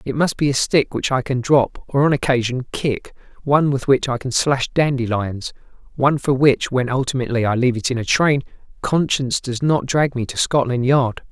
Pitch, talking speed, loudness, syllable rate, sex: 130 Hz, 205 wpm, -19 LUFS, 5.3 syllables/s, male